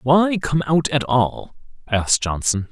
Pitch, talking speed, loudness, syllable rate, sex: 135 Hz, 155 wpm, -19 LUFS, 3.9 syllables/s, male